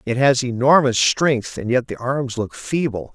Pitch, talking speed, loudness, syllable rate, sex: 125 Hz, 190 wpm, -19 LUFS, 4.3 syllables/s, male